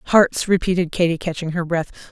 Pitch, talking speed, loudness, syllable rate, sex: 175 Hz, 170 wpm, -20 LUFS, 5.4 syllables/s, female